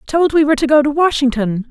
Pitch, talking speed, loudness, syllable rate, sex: 280 Hz, 245 wpm, -14 LUFS, 6.3 syllables/s, female